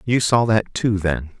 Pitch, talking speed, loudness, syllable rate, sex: 105 Hz, 215 wpm, -19 LUFS, 4.4 syllables/s, male